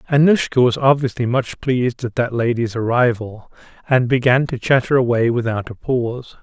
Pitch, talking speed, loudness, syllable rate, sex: 125 Hz, 160 wpm, -18 LUFS, 5.2 syllables/s, male